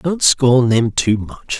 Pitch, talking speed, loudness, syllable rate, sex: 125 Hz, 190 wpm, -15 LUFS, 3.2 syllables/s, male